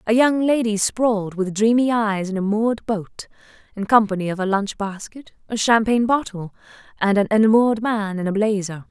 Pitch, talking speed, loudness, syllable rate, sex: 215 Hz, 180 wpm, -19 LUFS, 5.3 syllables/s, female